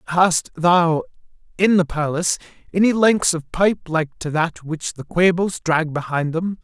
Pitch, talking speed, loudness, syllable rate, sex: 170 Hz, 165 wpm, -19 LUFS, 4.3 syllables/s, male